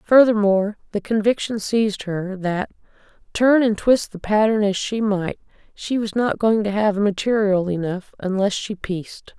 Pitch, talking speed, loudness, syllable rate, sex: 205 Hz, 160 wpm, -20 LUFS, 4.6 syllables/s, female